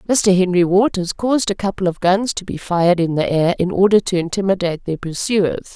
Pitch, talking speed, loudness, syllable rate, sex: 185 Hz, 210 wpm, -17 LUFS, 5.7 syllables/s, female